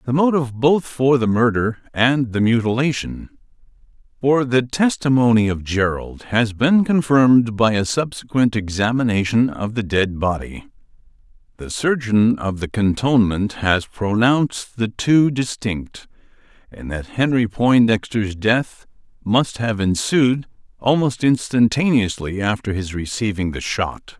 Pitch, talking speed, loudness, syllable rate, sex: 115 Hz, 125 wpm, -18 LUFS, 4.2 syllables/s, male